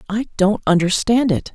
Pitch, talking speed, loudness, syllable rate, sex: 205 Hz, 155 wpm, -17 LUFS, 4.9 syllables/s, female